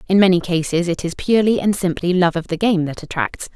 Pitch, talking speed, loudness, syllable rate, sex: 180 Hz, 235 wpm, -18 LUFS, 6.0 syllables/s, female